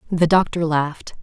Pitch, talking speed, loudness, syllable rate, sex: 165 Hz, 145 wpm, -19 LUFS, 5.3 syllables/s, female